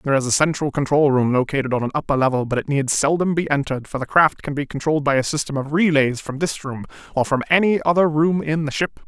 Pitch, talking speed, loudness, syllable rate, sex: 145 Hz, 260 wpm, -19 LUFS, 6.4 syllables/s, male